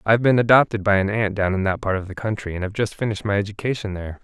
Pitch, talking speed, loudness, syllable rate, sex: 105 Hz, 295 wpm, -21 LUFS, 7.3 syllables/s, male